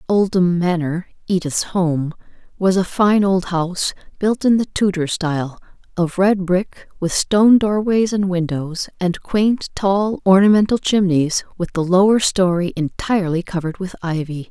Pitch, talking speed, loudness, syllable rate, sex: 185 Hz, 145 wpm, -18 LUFS, 4.5 syllables/s, female